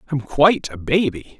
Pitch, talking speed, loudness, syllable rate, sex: 140 Hz, 170 wpm, -19 LUFS, 4.9 syllables/s, male